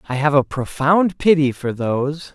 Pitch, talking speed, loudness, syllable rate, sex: 145 Hz, 180 wpm, -18 LUFS, 4.6 syllables/s, male